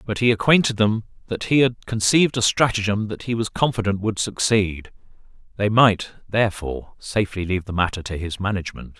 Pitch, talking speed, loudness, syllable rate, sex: 105 Hz, 175 wpm, -21 LUFS, 5.8 syllables/s, male